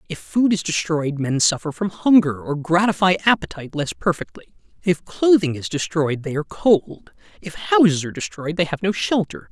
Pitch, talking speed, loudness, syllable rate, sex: 165 Hz, 175 wpm, -20 LUFS, 5.2 syllables/s, male